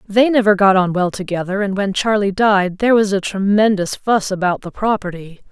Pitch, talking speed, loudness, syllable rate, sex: 200 Hz, 195 wpm, -16 LUFS, 5.3 syllables/s, female